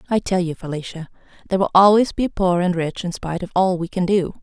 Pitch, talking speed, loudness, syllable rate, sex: 180 Hz, 245 wpm, -19 LUFS, 6.2 syllables/s, female